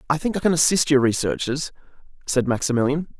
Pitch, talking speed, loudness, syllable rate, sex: 140 Hz, 170 wpm, -21 LUFS, 6.1 syllables/s, male